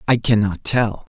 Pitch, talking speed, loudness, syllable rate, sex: 110 Hz, 155 wpm, -19 LUFS, 4.3 syllables/s, male